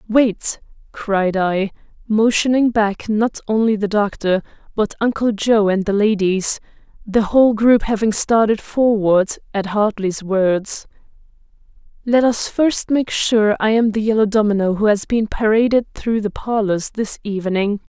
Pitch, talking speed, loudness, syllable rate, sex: 215 Hz, 140 wpm, -17 LUFS, 4.3 syllables/s, female